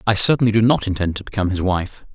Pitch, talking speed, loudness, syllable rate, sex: 105 Hz, 250 wpm, -18 LUFS, 7.2 syllables/s, male